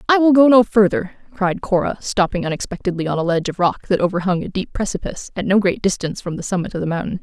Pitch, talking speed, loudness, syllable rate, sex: 190 Hz, 240 wpm, -18 LUFS, 6.8 syllables/s, female